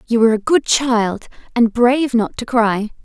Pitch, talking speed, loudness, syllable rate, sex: 235 Hz, 195 wpm, -16 LUFS, 4.8 syllables/s, female